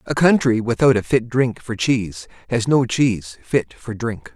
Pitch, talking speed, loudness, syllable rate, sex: 115 Hz, 195 wpm, -19 LUFS, 4.6 syllables/s, male